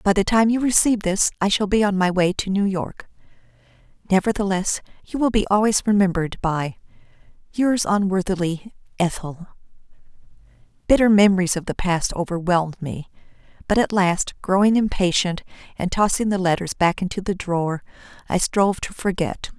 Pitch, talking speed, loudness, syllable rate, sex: 190 Hz, 150 wpm, -20 LUFS, 5.4 syllables/s, female